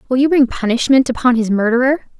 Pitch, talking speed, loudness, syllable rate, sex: 250 Hz, 190 wpm, -14 LUFS, 6.5 syllables/s, female